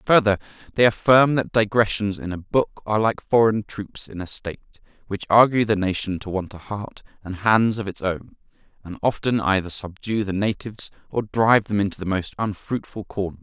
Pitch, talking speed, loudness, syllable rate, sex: 105 Hz, 190 wpm, -22 LUFS, 5.3 syllables/s, male